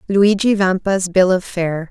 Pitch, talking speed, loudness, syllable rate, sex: 190 Hz, 160 wpm, -16 LUFS, 4.1 syllables/s, female